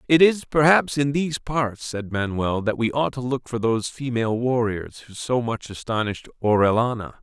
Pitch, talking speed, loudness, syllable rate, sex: 125 Hz, 185 wpm, -22 LUFS, 5.2 syllables/s, male